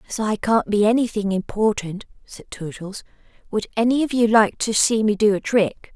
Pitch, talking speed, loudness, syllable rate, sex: 215 Hz, 190 wpm, -20 LUFS, 5.0 syllables/s, female